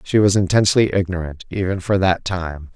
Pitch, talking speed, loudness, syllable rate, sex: 95 Hz, 175 wpm, -18 LUFS, 5.5 syllables/s, male